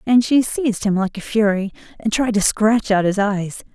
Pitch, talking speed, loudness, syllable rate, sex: 215 Hz, 225 wpm, -18 LUFS, 4.9 syllables/s, female